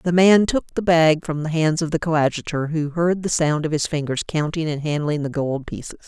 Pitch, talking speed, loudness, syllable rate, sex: 155 Hz, 235 wpm, -20 LUFS, 5.4 syllables/s, female